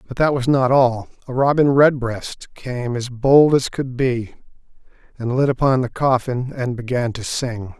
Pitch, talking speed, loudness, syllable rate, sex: 125 Hz, 175 wpm, -19 LUFS, 4.2 syllables/s, male